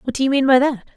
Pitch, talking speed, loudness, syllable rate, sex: 260 Hz, 375 wpm, -17 LUFS, 7.0 syllables/s, female